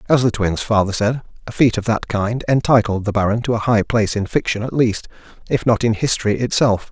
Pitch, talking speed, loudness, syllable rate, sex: 110 Hz, 225 wpm, -18 LUFS, 5.8 syllables/s, male